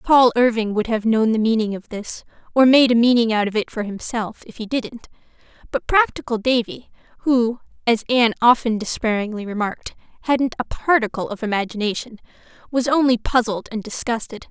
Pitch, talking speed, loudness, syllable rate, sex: 230 Hz, 165 wpm, -20 LUFS, 5.5 syllables/s, female